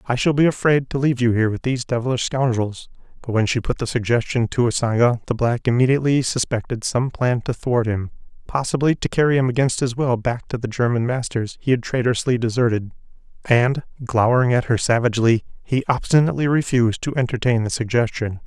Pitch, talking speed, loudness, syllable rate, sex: 120 Hz, 180 wpm, -20 LUFS, 6.1 syllables/s, male